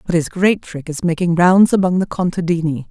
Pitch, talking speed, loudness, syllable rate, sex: 170 Hz, 205 wpm, -16 LUFS, 5.4 syllables/s, female